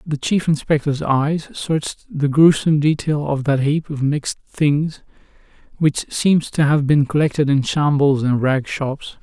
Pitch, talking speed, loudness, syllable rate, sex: 145 Hz, 165 wpm, -18 LUFS, 4.4 syllables/s, male